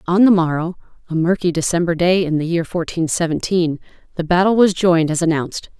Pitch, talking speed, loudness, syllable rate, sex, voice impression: 170 Hz, 185 wpm, -17 LUFS, 5.9 syllables/s, female, slightly gender-neutral, adult-like, slightly middle-aged, slightly thin, tensed, powerful, bright, hard, very clear, fluent, cool, slightly intellectual, refreshing, sincere, calm, slightly friendly, slightly reassuring, slightly elegant, slightly strict, slightly sharp